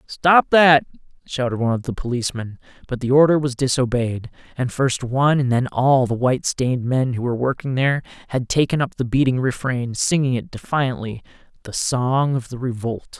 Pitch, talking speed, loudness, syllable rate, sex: 130 Hz, 175 wpm, -20 LUFS, 5.4 syllables/s, male